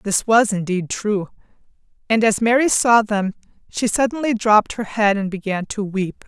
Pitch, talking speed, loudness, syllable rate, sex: 215 Hz, 170 wpm, -18 LUFS, 4.7 syllables/s, female